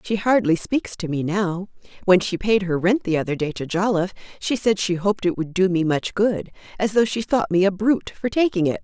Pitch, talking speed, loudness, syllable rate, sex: 190 Hz, 245 wpm, -21 LUFS, 5.5 syllables/s, female